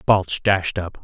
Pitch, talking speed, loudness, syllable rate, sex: 90 Hz, 175 wpm, -20 LUFS, 3.4 syllables/s, male